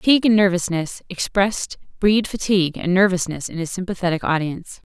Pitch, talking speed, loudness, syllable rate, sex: 185 Hz, 145 wpm, -20 LUFS, 6.0 syllables/s, female